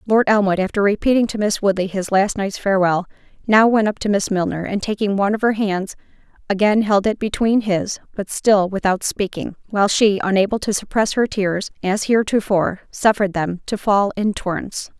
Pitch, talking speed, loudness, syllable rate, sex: 200 Hz, 185 wpm, -18 LUFS, 5.5 syllables/s, female